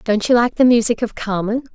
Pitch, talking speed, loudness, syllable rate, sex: 230 Hz, 240 wpm, -17 LUFS, 5.8 syllables/s, female